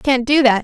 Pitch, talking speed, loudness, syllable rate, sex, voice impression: 255 Hz, 285 wpm, -14 LUFS, 4.7 syllables/s, female, very feminine, young, very thin, tensed, slightly powerful, bright, slightly soft, clear, fluent, cute, intellectual, very refreshing, very sincere, slightly calm, friendly, very reassuring, unique, very elegant, very wild, lively, kind, modest